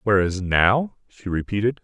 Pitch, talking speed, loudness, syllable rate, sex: 105 Hz, 130 wpm, -21 LUFS, 4.3 syllables/s, male